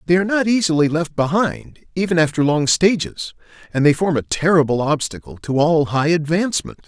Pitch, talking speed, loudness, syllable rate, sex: 160 Hz, 175 wpm, -18 LUFS, 5.5 syllables/s, male